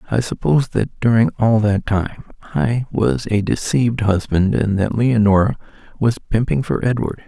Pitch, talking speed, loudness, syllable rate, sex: 110 Hz, 155 wpm, -18 LUFS, 4.5 syllables/s, male